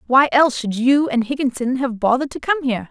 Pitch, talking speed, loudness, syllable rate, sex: 260 Hz, 225 wpm, -18 LUFS, 6.2 syllables/s, female